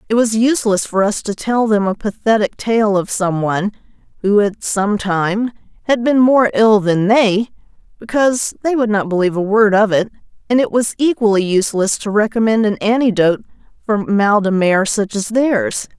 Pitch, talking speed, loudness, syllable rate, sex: 210 Hz, 185 wpm, -15 LUFS, 5.0 syllables/s, female